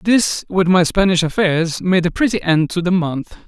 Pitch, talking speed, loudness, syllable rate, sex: 180 Hz, 205 wpm, -16 LUFS, 4.6 syllables/s, male